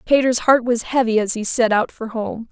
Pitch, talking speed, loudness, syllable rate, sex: 235 Hz, 240 wpm, -18 LUFS, 5.1 syllables/s, female